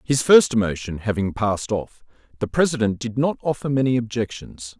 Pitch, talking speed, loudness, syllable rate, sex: 115 Hz, 165 wpm, -21 LUFS, 5.4 syllables/s, male